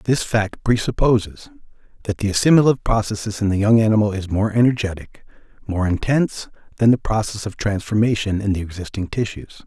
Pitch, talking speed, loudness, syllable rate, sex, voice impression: 105 Hz, 155 wpm, -19 LUFS, 5.9 syllables/s, male, very masculine, very middle-aged, thick, tensed, very powerful, bright, soft, slightly muffled, fluent, raspy, cool, intellectual, slightly refreshing, sincere, calm, mature, friendly, reassuring, unique, slightly elegant, wild, sweet, very lively, kind, slightly modest